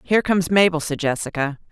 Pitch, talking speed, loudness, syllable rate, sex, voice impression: 170 Hz, 175 wpm, -20 LUFS, 6.5 syllables/s, female, feminine, adult-like, tensed, powerful, slightly hard, clear, fluent, intellectual, slightly unique, lively, slightly strict, sharp